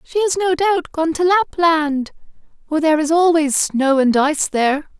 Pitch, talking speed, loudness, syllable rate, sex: 315 Hz, 180 wpm, -16 LUFS, 4.7 syllables/s, female